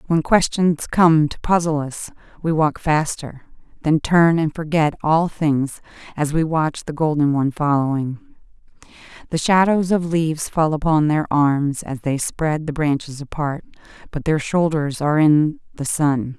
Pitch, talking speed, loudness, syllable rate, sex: 155 Hz, 155 wpm, -19 LUFS, 4.3 syllables/s, female